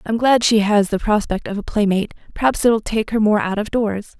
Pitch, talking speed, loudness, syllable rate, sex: 215 Hz, 245 wpm, -18 LUFS, 5.8 syllables/s, female